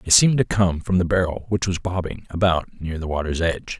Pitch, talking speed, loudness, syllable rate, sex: 90 Hz, 235 wpm, -21 LUFS, 5.8 syllables/s, male